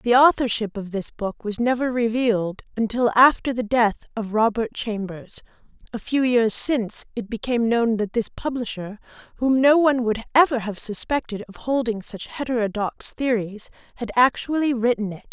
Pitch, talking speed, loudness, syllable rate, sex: 230 Hz, 160 wpm, -22 LUFS, 5.1 syllables/s, female